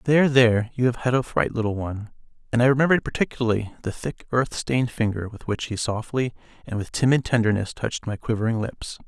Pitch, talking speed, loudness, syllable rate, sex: 115 Hz, 200 wpm, -23 LUFS, 6.3 syllables/s, male